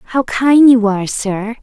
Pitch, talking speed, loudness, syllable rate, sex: 230 Hz, 185 wpm, -12 LUFS, 3.9 syllables/s, female